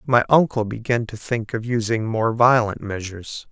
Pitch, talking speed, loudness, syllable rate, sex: 115 Hz, 170 wpm, -21 LUFS, 4.8 syllables/s, male